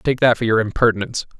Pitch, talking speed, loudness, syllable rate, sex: 115 Hz, 215 wpm, -18 LUFS, 7.1 syllables/s, male